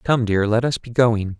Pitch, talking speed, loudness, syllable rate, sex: 115 Hz, 255 wpm, -19 LUFS, 4.7 syllables/s, male